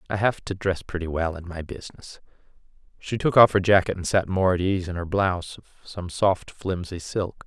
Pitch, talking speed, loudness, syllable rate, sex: 90 Hz, 215 wpm, -24 LUFS, 5.3 syllables/s, male